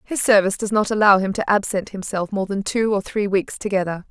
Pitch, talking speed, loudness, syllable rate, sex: 200 Hz, 235 wpm, -20 LUFS, 5.8 syllables/s, female